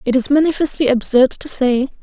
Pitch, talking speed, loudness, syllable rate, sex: 265 Hz, 180 wpm, -15 LUFS, 5.5 syllables/s, female